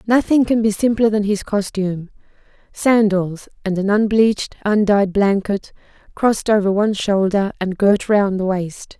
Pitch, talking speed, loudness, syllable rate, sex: 205 Hz, 140 wpm, -17 LUFS, 4.7 syllables/s, female